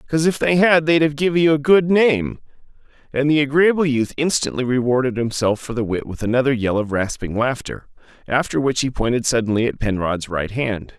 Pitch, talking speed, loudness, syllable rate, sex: 135 Hz, 195 wpm, -19 LUFS, 5.5 syllables/s, male